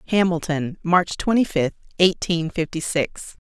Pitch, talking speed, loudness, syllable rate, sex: 170 Hz, 120 wpm, -21 LUFS, 4.2 syllables/s, female